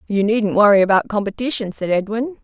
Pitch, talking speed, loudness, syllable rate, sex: 210 Hz, 175 wpm, -17 LUFS, 5.9 syllables/s, female